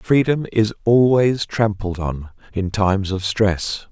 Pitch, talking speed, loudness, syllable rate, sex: 105 Hz, 140 wpm, -19 LUFS, 3.8 syllables/s, male